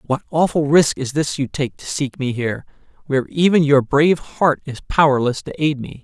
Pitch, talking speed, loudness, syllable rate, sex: 145 Hz, 210 wpm, -18 LUFS, 5.3 syllables/s, male